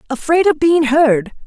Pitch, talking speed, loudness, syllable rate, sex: 290 Hz, 165 wpm, -14 LUFS, 4.2 syllables/s, female